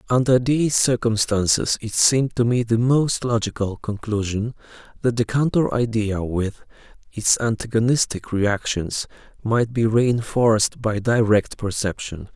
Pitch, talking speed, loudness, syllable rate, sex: 115 Hz, 120 wpm, -21 LUFS, 4.4 syllables/s, male